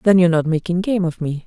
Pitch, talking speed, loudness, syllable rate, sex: 175 Hz, 285 wpm, -18 LUFS, 6.7 syllables/s, female